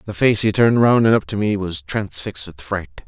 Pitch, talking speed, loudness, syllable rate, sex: 100 Hz, 255 wpm, -18 LUFS, 5.5 syllables/s, male